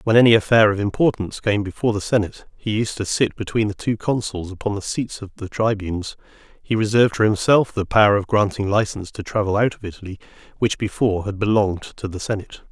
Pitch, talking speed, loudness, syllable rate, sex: 105 Hz, 210 wpm, -20 LUFS, 6.4 syllables/s, male